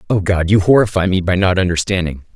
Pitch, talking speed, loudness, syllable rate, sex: 95 Hz, 205 wpm, -15 LUFS, 6.3 syllables/s, male